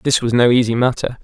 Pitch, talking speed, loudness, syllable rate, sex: 120 Hz, 245 wpm, -15 LUFS, 5.9 syllables/s, male